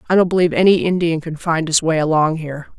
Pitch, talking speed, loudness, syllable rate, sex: 165 Hz, 235 wpm, -16 LUFS, 6.8 syllables/s, female